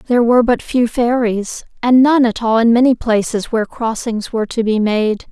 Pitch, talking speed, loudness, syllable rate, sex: 230 Hz, 205 wpm, -15 LUFS, 5.1 syllables/s, female